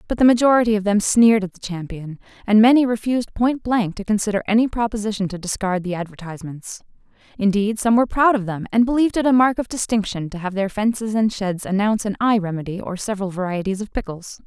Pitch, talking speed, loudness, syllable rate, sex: 210 Hz, 205 wpm, -19 LUFS, 6.4 syllables/s, female